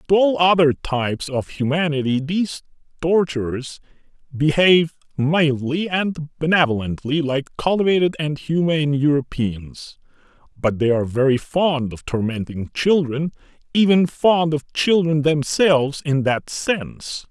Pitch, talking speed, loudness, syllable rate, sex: 150 Hz, 115 wpm, -19 LUFS, 4.4 syllables/s, male